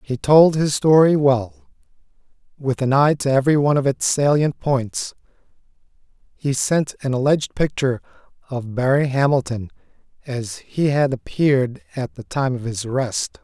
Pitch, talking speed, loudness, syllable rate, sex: 135 Hz, 145 wpm, -19 LUFS, 4.9 syllables/s, male